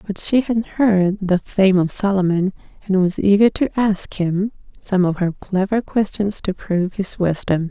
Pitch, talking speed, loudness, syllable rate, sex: 195 Hz, 180 wpm, -19 LUFS, 4.4 syllables/s, female